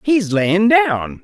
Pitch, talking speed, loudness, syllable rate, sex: 175 Hz, 145 wpm, -15 LUFS, 2.7 syllables/s, male